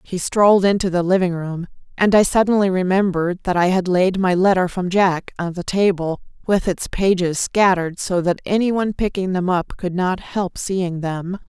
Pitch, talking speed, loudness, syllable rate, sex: 185 Hz, 190 wpm, -19 LUFS, 5.0 syllables/s, female